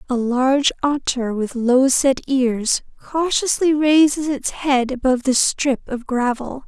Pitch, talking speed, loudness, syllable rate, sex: 265 Hz, 145 wpm, -18 LUFS, 3.9 syllables/s, female